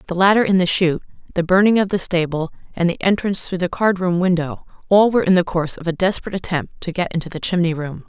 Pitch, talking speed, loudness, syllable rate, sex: 180 Hz, 240 wpm, -18 LUFS, 6.7 syllables/s, female